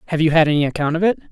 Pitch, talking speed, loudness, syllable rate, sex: 155 Hz, 320 wpm, -17 LUFS, 8.9 syllables/s, male